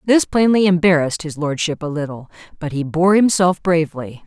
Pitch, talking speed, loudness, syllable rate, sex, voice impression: 170 Hz, 170 wpm, -17 LUFS, 5.6 syllables/s, female, feminine, adult-like, slightly fluent, slightly intellectual, slightly sharp